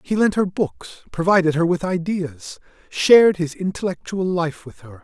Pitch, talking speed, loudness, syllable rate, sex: 175 Hz, 165 wpm, -19 LUFS, 4.8 syllables/s, male